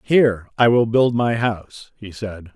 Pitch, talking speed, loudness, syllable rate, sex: 110 Hz, 190 wpm, -18 LUFS, 4.4 syllables/s, male